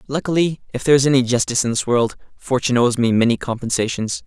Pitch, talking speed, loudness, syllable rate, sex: 125 Hz, 195 wpm, -18 LUFS, 6.9 syllables/s, male